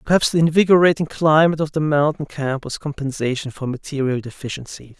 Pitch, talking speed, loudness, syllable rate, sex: 145 Hz, 155 wpm, -19 LUFS, 5.9 syllables/s, male